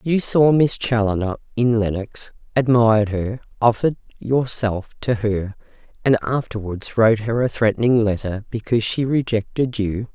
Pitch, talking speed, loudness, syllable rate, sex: 115 Hz, 125 wpm, -20 LUFS, 4.8 syllables/s, female